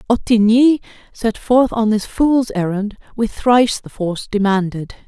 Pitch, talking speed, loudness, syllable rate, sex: 220 Hz, 140 wpm, -16 LUFS, 4.5 syllables/s, female